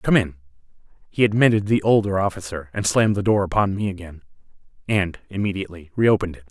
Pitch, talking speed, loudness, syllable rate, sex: 95 Hz, 165 wpm, -21 LUFS, 6.5 syllables/s, male